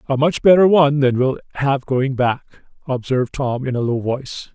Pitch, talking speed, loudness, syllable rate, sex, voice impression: 135 Hz, 200 wpm, -18 LUFS, 5.2 syllables/s, male, masculine, middle-aged, powerful, slightly hard, nasal, intellectual, sincere, calm, slightly friendly, wild, lively, strict